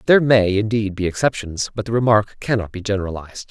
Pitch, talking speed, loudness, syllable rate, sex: 105 Hz, 190 wpm, -19 LUFS, 6.4 syllables/s, male